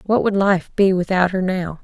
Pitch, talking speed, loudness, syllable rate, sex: 190 Hz, 230 wpm, -18 LUFS, 4.7 syllables/s, female